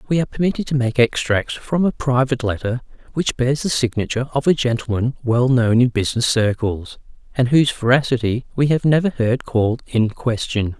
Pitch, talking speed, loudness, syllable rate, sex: 125 Hz, 180 wpm, -19 LUFS, 5.6 syllables/s, male